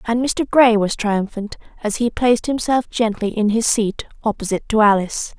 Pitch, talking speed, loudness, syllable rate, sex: 225 Hz, 180 wpm, -18 LUFS, 5.2 syllables/s, female